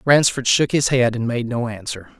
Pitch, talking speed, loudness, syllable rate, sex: 125 Hz, 220 wpm, -19 LUFS, 4.9 syllables/s, male